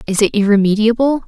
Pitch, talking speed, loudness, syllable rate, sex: 220 Hz, 140 wpm, -14 LUFS, 6.3 syllables/s, female